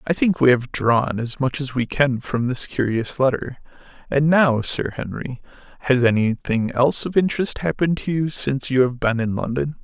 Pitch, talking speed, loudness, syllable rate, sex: 130 Hz, 195 wpm, -20 LUFS, 5.1 syllables/s, male